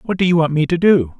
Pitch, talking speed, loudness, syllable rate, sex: 160 Hz, 355 wpm, -15 LUFS, 6.1 syllables/s, male